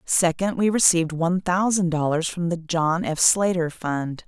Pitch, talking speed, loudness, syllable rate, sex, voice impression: 170 Hz, 170 wpm, -21 LUFS, 4.6 syllables/s, female, feminine, slightly gender-neutral, adult-like, slightly middle-aged, slightly thin, slightly relaxed, slightly weak, slightly dark, slightly hard, slightly clear, slightly fluent, slightly cool, intellectual, slightly refreshing, sincere, very calm, friendly, reassuring, elegant, kind, modest